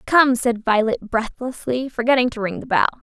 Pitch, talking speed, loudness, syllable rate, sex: 240 Hz, 175 wpm, -20 LUFS, 5.2 syllables/s, female